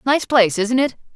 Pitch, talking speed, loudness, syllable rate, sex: 240 Hz, 205 wpm, -17 LUFS, 5.7 syllables/s, female